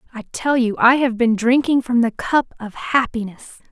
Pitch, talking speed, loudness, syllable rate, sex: 240 Hz, 195 wpm, -18 LUFS, 4.7 syllables/s, female